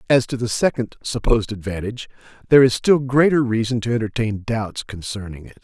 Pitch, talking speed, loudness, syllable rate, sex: 115 Hz, 170 wpm, -20 LUFS, 5.9 syllables/s, male